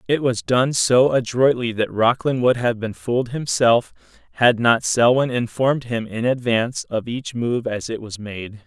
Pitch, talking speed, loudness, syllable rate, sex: 120 Hz, 180 wpm, -20 LUFS, 4.5 syllables/s, male